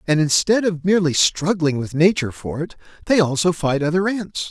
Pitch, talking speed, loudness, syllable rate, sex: 165 Hz, 185 wpm, -19 LUFS, 5.5 syllables/s, male